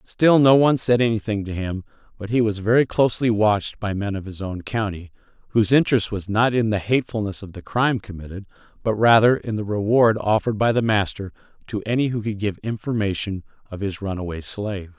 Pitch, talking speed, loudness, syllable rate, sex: 105 Hz, 195 wpm, -21 LUFS, 5.9 syllables/s, male